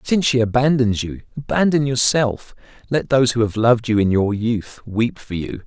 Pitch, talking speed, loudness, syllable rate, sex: 120 Hz, 190 wpm, -18 LUFS, 5.2 syllables/s, male